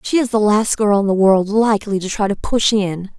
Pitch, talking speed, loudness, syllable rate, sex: 205 Hz, 265 wpm, -16 LUFS, 5.3 syllables/s, female